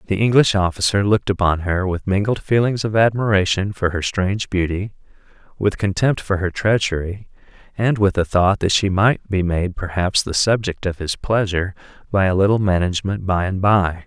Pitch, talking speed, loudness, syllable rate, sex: 95 Hz, 180 wpm, -19 LUFS, 5.2 syllables/s, male